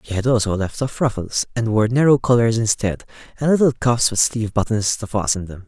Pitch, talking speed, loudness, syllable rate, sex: 115 Hz, 210 wpm, -19 LUFS, 5.7 syllables/s, male